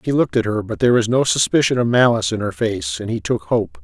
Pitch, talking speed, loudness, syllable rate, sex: 120 Hz, 280 wpm, -18 LUFS, 6.5 syllables/s, male